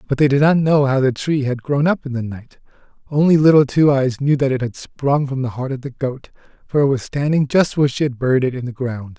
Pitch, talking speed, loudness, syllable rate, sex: 135 Hz, 275 wpm, -17 LUFS, 5.8 syllables/s, male